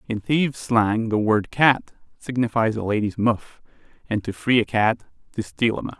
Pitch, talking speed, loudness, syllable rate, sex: 115 Hz, 190 wpm, -22 LUFS, 4.7 syllables/s, male